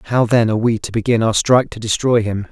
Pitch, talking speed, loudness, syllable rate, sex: 115 Hz, 265 wpm, -16 LUFS, 6.6 syllables/s, male